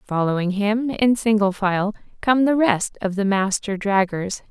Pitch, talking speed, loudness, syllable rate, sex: 205 Hz, 160 wpm, -20 LUFS, 4.2 syllables/s, female